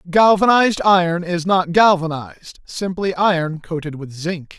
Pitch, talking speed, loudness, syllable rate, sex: 175 Hz, 120 wpm, -17 LUFS, 4.7 syllables/s, male